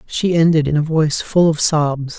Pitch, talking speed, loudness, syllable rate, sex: 155 Hz, 220 wpm, -16 LUFS, 4.9 syllables/s, male